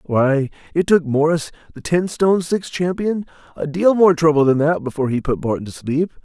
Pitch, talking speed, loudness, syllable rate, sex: 160 Hz, 200 wpm, -18 LUFS, 5.3 syllables/s, male